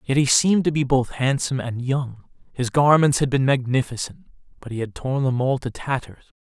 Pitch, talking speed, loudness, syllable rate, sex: 130 Hz, 205 wpm, -21 LUFS, 5.6 syllables/s, male